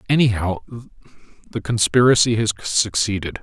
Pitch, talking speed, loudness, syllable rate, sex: 105 Hz, 90 wpm, -18 LUFS, 5.3 syllables/s, male